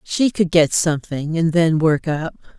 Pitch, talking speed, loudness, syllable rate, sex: 165 Hz, 185 wpm, -18 LUFS, 4.4 syllables/s, female